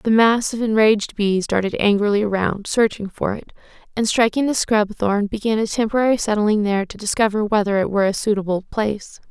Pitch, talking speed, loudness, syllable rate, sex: 210 Hz, 185 wpm, -19 LUFS, 5.8 syllables/s, female